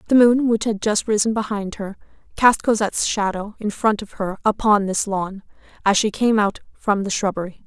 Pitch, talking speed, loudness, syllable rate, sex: 210 Hz, 195 wpm, -20 LUFS, 5.1 syllables/s, female